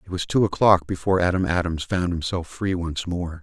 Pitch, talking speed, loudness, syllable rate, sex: 90 Hz, 210 wpm, -22 LUFS, 5.4 syllables/s, male